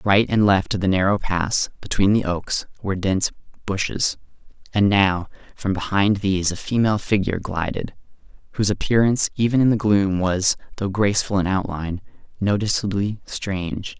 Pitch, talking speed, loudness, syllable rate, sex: 100 Hz, 150 wpm, -21 LUFS, 5.4 syllables/s, male